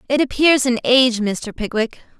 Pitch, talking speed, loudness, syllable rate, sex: 245 Hz, 165 wpm, -17 LUFS, 5.0 syllables/s, female